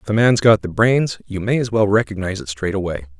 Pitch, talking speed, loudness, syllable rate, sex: 105 Hz, 265 wpm, -18 LUFS, 6.2 syllables/s, male